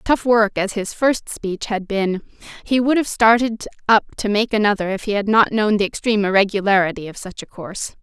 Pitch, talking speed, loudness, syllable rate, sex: 210 Hz, 210 wpm, -18 LUFS, 5.5 syllables/s, female